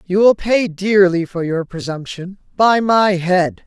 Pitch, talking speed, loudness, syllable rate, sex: 190 Hz, 165 wpm, -16 LUFS, 3.8 syllables/s, female